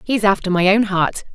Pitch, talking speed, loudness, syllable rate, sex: 195 Hz, 225 wpm, -17 LUFS, 5.1 syllables/s, female